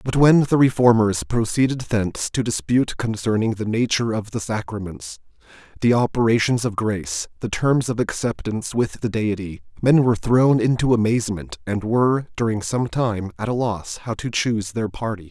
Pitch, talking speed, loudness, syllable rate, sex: 115 Hz, 170 wpm, -21 LUFS, 5.2 syllables/s, male